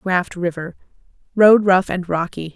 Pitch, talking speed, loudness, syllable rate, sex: 180 Hz, 115 wpm, -17 LUFS, 4.3 syllables/s, female